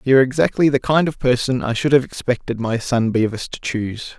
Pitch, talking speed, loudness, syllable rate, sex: 125 Hz, 230 wpm, -19 LUFS, 6.0 syllables/s, male